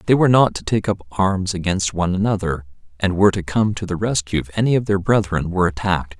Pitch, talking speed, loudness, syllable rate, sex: 95 Hz, 235 wpm, -19 LUFS, 6.4 syllables/s, male